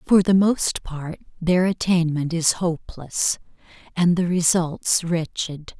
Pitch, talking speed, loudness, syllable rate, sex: 170 Hz, 125 wpm, -21 LUFS, 3.7 syllables/s, female